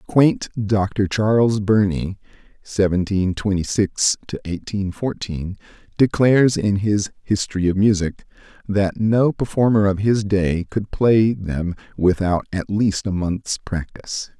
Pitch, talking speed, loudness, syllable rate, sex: 100 Hz, 130 wpm, -20 LUFS, 3.2 syllables/s, male